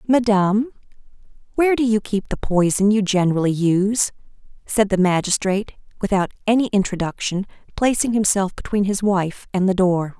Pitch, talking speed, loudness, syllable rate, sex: 200 Hz, 140 wpm, -19 LUFS, 5.4 syllables/s, female